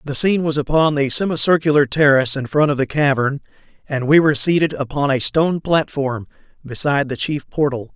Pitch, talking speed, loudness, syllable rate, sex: 145 Hz, 180 wpm, -17 LUFS, 5.9 syllables/s, male